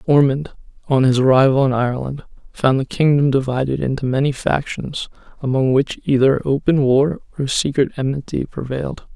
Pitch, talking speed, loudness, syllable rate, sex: 135 Hz, 145 wpm, -18 LUFS, 5.3 syllables/s, male